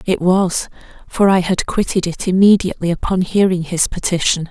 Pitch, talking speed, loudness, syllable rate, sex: 185 Hz, 160 wpm, -16 LUFS, 5.2 syllables/s, female